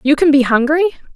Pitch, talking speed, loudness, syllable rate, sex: 290 Hz, 210 wpm, -13 LUFS, 6.9 syllables/s, female